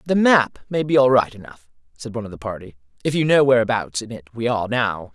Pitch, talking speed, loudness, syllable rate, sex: 120 Hz, 245 wpm, -19 LUFS, 6.3 syllables/s, male